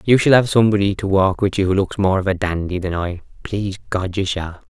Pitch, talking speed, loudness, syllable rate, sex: 95 Hz, 240 wpm, -18 LUFS, 6.0 syllables/s, male